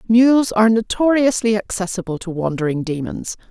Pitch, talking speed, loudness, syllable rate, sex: 210 Hz, 120 wpm, -18 LUFS, 5.3 syllables/s, female